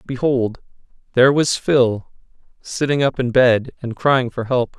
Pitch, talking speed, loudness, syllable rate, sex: 125 Hz, 140 wpm, -18 LUFS, 4.2 syllables/s, male